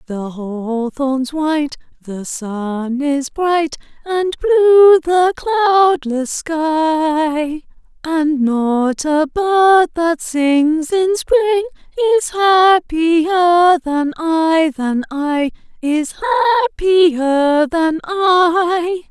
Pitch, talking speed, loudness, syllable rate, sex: 315 Hz, 95 wpm, -15 LUFS, 2.7 syllables/s, female